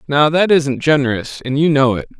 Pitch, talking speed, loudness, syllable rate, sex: 145 Hz, 220 wpm, -15 LUFS, 5.1 syllables/s, male